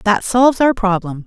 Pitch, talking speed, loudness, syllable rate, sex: 210 Hz, 190 wpm, -15 LUFS, 5.2 syllables/s, female